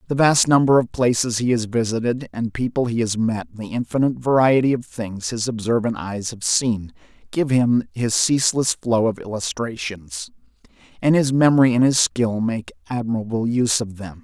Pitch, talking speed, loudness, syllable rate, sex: 120 Hz, 175 wpm, -20 LUFS, 5.1 syllables/s, male